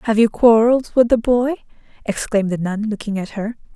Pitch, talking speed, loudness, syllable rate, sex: 220 Hz, 190 wpm, -17 LUFS, 5.8 syllables/s, female